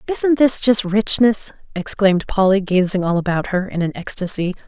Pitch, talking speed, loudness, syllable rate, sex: 200 Hz, 165 wpm, -17 LUFS, 5.1 syllables/s, female